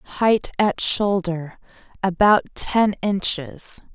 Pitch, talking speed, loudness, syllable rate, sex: 195 Hz, 75 wpm, -20 LUFS, 2.9 syllables/s, female